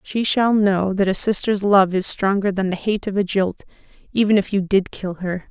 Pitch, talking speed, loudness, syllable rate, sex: 195 Hz, 220 wpm, -19 LUFS, 4.9 syllables/s, female